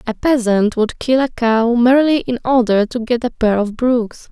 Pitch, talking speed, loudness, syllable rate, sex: 235 Hz, 210 wpm, -15 LUFS, 4.9 syllables/s, female